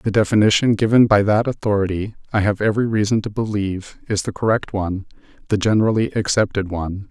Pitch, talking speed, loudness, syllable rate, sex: 105 Hz, 170 wpm, -19 LUFS, 6.3 syllables/s, male